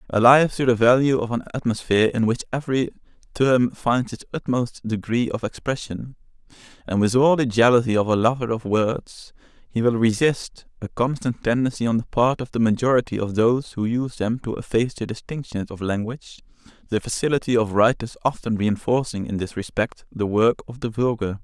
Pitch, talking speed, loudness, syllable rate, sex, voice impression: 120 Hz, 180 wpm, -22 LUFS, 5.5 syllables/s, male, masculine, adult-like, tensed, slightly powerful, slightly bright, clear, calm, friendly, slightly reassuring, kind, modest